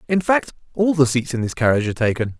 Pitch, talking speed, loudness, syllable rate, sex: 140 Hz, 250 wpm, -19 LUFS, 7.0 syllables/s, male